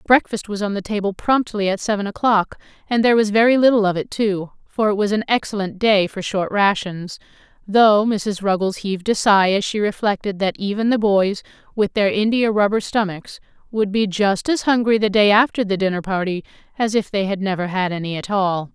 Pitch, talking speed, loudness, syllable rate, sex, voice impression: 205 Hz, 205 wpm, -19 LUFS, 5.4 syllables/s, female, feminine, adult-like, tensed, powerful, clear, fluent, intellectual, friendly, lively, slightly sharp